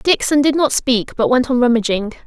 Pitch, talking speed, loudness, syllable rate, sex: 250 Hz, 210 wpm, -16 LUFS, 5.2 syllables/s, female